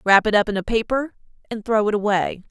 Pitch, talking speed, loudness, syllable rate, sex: 210 Hz, 240 wpm, -20 LUFS, 5.9 syllables/s, female